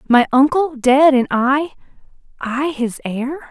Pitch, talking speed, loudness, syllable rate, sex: 270 Hz, 120 wpm, -16 LUFS, 3.5 syllables/s, female